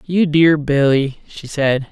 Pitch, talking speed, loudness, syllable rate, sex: 150 Hz, 155 wpm, -15 LUFS, 3.4 syllables/s, male